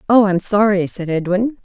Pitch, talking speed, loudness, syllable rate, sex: 200 Hz, 185 wpm, -16 LUFS, 5.0 syllables/s, female